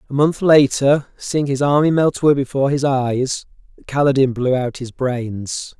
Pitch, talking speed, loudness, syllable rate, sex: 135 Hz, 165 wpm, -17 LUFS, 4.5 syllables/s, male